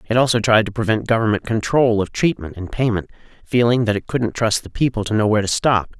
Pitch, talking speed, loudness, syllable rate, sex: 110 Hz, 230 wpm, -18 LUFS, 6.0 syllables/s, male